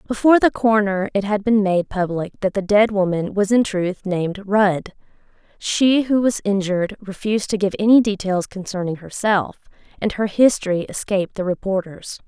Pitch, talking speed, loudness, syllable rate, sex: 200 Hz, 165 wpm, -19 LUFS, 5.2 syllables/s, female